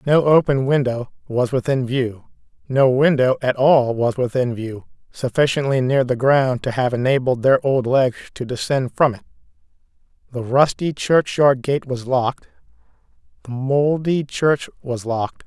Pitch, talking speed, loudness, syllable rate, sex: 130 Hz, 145 wpm, -19 LUFS, 4.5 syllables/s, male